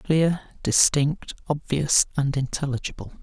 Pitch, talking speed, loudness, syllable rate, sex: 145 Hz, 95 wpm, -23 LUFS, 3.9 syllables/s, male